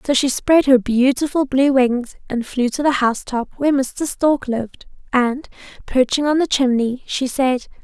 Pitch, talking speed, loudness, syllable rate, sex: 265 Hz, 175 wpm, -18 LUFS, 4.7 syllables/s, female